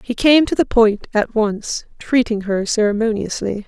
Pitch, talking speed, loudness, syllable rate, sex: 220 Hz, 165 wpm, -17 LUFS, 4.4 syllables/s, female